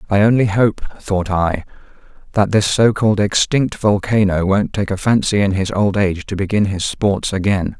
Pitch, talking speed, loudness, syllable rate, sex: 100 Hz, 175 wpm, -16 LUFS, 4.9 syllables/s, male